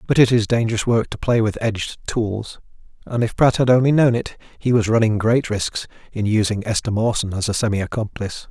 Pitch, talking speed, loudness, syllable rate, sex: 110 Hz, 210 wpm, -19 LUFS, 5.7 syllables/s, male